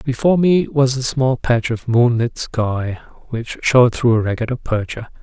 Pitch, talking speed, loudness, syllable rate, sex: 125 Hz, 170 wpm, -17 LUFS, 4.9 syllables/s, male